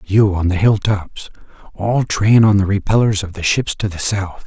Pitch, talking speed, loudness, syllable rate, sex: 100 Hz, 200 wpm, -16 LUFS, 4.6 syllables/s, male